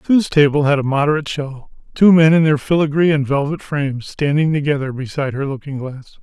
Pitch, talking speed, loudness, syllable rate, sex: 145 Hz, 195 wpm, -16 LUFS, 5.8 syllables/s, male